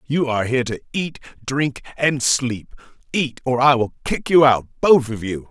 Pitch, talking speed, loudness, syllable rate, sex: 135 Hz, 185 wpm, -19 LUFS, 4.7 syllables/s, male